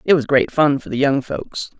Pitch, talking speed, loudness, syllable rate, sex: 140 Hz, 270 wpm, -18 LUFS, 4.9 syllables/s, female